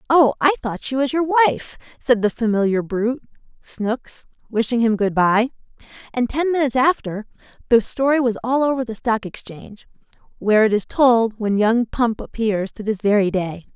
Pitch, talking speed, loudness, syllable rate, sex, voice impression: 235 Hz, 175 wpm, -19 LUFS, 5.0 syllables/s, female, very feminine, slightly adult-like, slightly cute, slightly refreshing, friendly